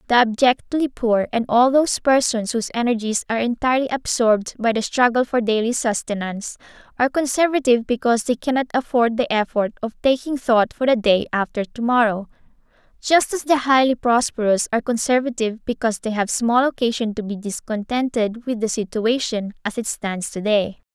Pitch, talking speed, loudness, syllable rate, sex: 235 Hz, 160 wpm, -20 LUFS, 5.6 syllables/s, female